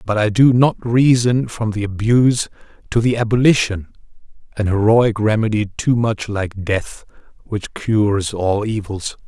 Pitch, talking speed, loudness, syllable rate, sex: 110 Hz, 135 wpm, -17 LUFS, 4.3 syllables/s, male